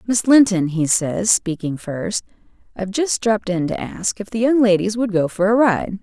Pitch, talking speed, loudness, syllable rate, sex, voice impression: 200 Hz, 210 wpm, -18 LUFS, 4.9 syllables/s, female, very feminine, slightly young, adult-like, thin, tensed, slightly weak, bright, slightly soft, clear, very fluent, very cute, intellectual, very refreshing, sincere, calm, very friendly, reassuring, unique, elegant, slightly wild, very sweet, slightly lively, kind, slightly sharp, slightly modest, light